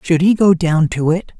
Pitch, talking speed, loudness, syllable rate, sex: 170 Hz, 255 wpm, -14 LUFS, 4.7 syllables/s, male